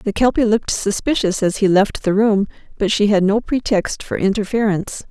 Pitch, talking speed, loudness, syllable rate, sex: 205 Hz, 190 wpm, -17 LUFS, 5.3 syllables/s, female